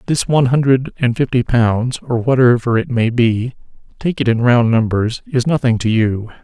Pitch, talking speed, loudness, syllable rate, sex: 120 Hz, 170 wpm, -15 LUFS, 5.0 syllables/s, male